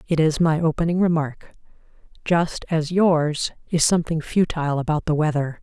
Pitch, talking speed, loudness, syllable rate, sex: 160 Hz, 150 wpm, -21 LUFS, 5.0 syllables/s, female